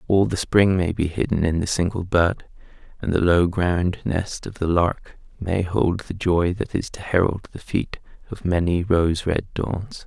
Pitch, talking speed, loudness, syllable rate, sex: 90 Hz, 195 wpm, -22 LUFS, 4.2 syllables/s, male